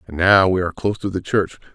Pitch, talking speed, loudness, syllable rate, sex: 95 Hz, 275 wpm, -18 LUFS, 6.9 syllables/s, male